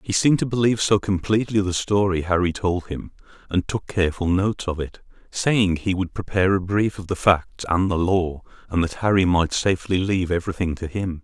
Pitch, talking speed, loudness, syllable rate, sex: 95 Hz, 205 wpm, -22 LUFS, 5.7 syllables/s, male